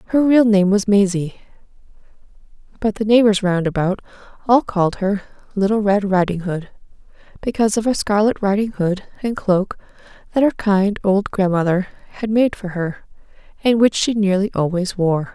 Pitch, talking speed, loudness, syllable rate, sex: 200 Hz, 155 wpm, -18 LUFS, 4.8 syllables/s, female